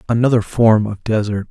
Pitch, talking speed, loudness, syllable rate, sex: 110 Hz, 160 wpm, -16 LUFS, 5.3 syllables/s, male